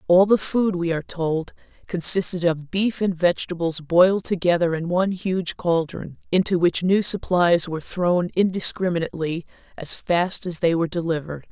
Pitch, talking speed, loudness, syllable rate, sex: 175 Hz, 155 wpm, -22 LUFS, 5.1 syllables/s, female